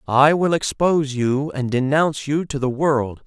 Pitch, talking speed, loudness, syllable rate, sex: 140 Hz, 185 wpm, -19 LUFS, 4.5 syllables/s, male